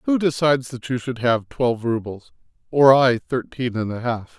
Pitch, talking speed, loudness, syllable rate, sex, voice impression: 125 Hz, 190 wpm, -20 LUFS, 4.9 syllables/s, male, very masculine, old, very thick, relaxed, very powerful, dark, slightly hard, clear, fluent, raspy, slightly cool, intellectual, very sincere, very calm, very mature, slightly friendly, slightly reassuring, very unique, slightly elegant, very wild, slightly sweet, slightly lively, strict, slightly intense, slightly sharp